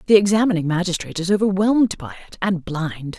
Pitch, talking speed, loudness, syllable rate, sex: 185 Hz, 150 wpm, -20 LUFS, 6.3 syllables/s, female